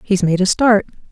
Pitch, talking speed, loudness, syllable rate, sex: 200 Hz, 215 wpm, -15 LUFS, 5.2 syllables/s, female